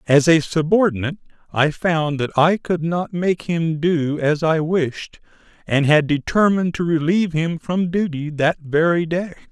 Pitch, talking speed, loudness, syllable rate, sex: 160 Hz, 165 wpm, -19 LUFS, 4.5 syllables/s, male